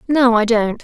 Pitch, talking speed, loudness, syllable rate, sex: 235 Hz, 215 wpm, -15 LUFS, 4.2 syllables/s, female